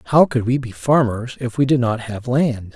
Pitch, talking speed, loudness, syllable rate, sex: 125 Hz, 240 wpm, -19 LUFS, 4.8 syllables/s, male